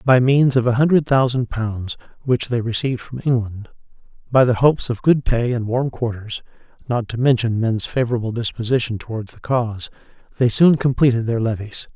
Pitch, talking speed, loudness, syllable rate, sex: 120 Hz, 175 wpm, -19 LUFS, 5.4 syllables/s, male